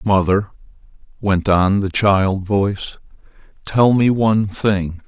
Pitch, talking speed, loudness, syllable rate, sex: 100 Hz, 120 wpm, -17 LUFS, 3.6 syllables/s, male